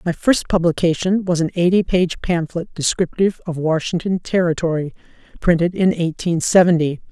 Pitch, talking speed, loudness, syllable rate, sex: 170 Hz, 135 wpm, -18 LUFS, 5.3 syllables/s, female